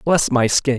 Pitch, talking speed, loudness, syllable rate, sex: 135 Hz, 230 wpm, -17 LUFS, 4.2 syllables/s, male